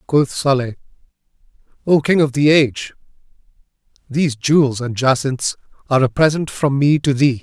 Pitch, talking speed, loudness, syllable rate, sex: 135 Hz, 145 wpm, -16 LUFS, 5.3 syllables/s, male